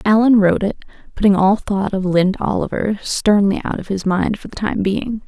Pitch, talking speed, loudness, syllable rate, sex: 200 Hz, 205 wpm, -17 LUFS, 5.4 syllables/s, female